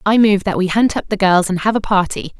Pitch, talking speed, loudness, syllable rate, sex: 200 Hz, 300 wpm, -15 LUFS, 5.8 syllables/s, female